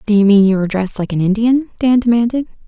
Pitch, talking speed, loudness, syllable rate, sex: 215 Hz, 200 wpm, -14 LUFS, 6.6 syllables/s, female